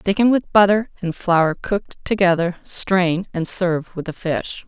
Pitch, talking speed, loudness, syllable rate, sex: 185 Hz, 165 wpm, -19 LUFS, 4.4 syllables/s, female